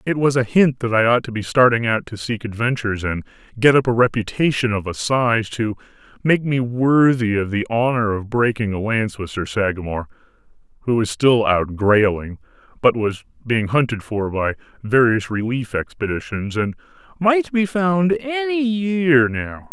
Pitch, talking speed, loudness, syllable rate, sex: 125 Hz, 175 wpm, -19 LUFS, 4.7 syllables/s, male